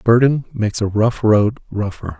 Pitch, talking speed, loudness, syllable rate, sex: 110 Hz, 190 wpm, -17 LUFS, 5.1 syllables/s, male